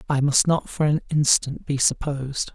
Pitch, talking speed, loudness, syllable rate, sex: 145 Hz, 190 wpm, -22 LUFS, 4.8 syllables/s, male